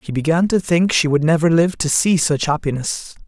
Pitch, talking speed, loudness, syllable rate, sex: 160 Hz, 220 wpm, -17 LUFS, 5.2 syllables/s, male